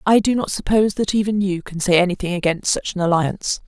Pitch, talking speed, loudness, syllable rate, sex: 190 Hz, 230 wpm, -19 LUFS, 6.3 syllables/s, female